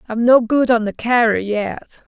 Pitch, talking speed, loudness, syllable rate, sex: 230 Hz, 195 wpm, -16 LUFS, 4.2 syllables/s, female